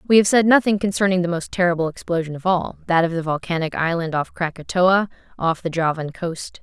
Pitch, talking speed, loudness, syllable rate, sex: 175 Hz, 200 wpm, -20 LUFS, 5.8 syllables/s, female